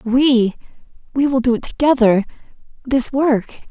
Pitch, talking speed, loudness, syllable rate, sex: 250 Hz, 95 wpm, -17 LUFS, 4.2 syllables/s, female